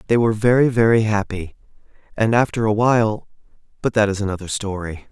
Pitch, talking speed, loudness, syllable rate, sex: 110 Hz, 155 wpm, -19 LUFS, 6.1 syllables/s, male